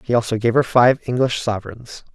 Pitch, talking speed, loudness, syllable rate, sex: 120 Hz, 195 wpm, -18 LUFS, 5.7 syllables/s, male